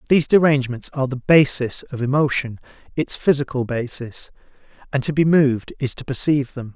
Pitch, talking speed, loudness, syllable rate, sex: 135 Hz, 160 wpm, -20 LUFS, 5.8 syllables/s, male